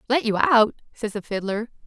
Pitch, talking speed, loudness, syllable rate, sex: 225 Hz, 195 wpm, -22 LUFS, 5.2 syllables/s, female